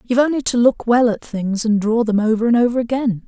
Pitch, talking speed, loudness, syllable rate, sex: 230 Hz, 255 wpm, -17 LUFS, 6.0 syllables/s, female